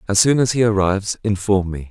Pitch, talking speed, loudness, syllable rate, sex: 100 Hz, 220 wpm, -18 LUFS, 5.9 syllables/s, male